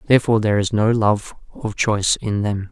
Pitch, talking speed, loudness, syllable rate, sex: 105 Hz, 200 wpm, -19 LUFS, 6.2 syllables/s, male